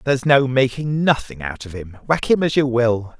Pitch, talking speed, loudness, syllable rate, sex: 125 Hz, 225 wpm, -18 LUFS, 4.9 syllables/s, male